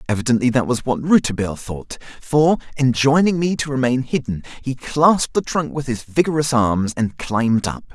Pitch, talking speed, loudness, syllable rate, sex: 130 Hz, 175 wpm, -19 LUFS, 5.4 syllables/s, male